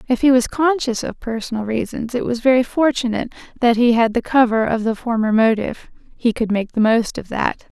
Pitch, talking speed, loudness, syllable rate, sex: 235 Hz, 210 wpm, -18 LUFS, 5.5 syllables/s, female